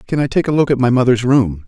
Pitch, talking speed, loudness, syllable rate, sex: 125 Hz, 325 wpm, -14 LUFS, 6.5 syllables/s, male